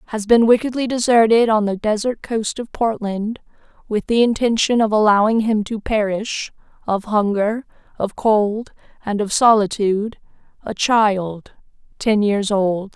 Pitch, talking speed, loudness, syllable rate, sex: 215 Hz, 140 wpm, -18 LUFS, 4.3 syllables/s, female